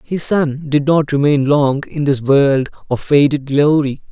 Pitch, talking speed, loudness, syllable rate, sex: 145 Hz, 175 wpm, -15 LUFS, 4.2 syllables/s, male